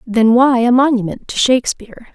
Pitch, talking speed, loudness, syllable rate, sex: 240 Hz, 170 wpm, -13 LUFS, 5.6 syllables/s, female